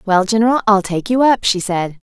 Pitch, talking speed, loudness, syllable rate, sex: 205 Hz, 225 wpm, -15 LUFS, 5.6 syllables/s, female